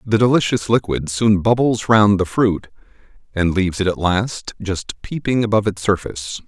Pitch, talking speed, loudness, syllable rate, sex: 105 Hz, 165 wpm, -18 LUFS, 5.1 syllables/s, male